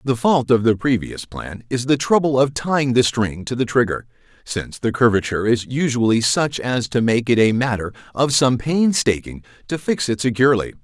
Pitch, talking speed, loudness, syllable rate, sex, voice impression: 125 Hz, 195 wpm, -19 LUFS, 5.2 syllables/s, male, masculine, very adult-like, slightly thick, slightly intellectual, slightly refreshing